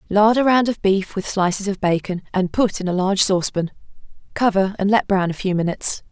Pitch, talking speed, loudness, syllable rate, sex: 195 Hz, 215 wpm, -19 LUFS, 5.9 syllables/s, female